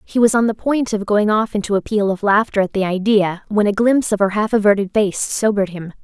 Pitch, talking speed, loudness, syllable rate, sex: 205 Hz, 260 wpm, -17 LUFS, 5.8 syllables/s, female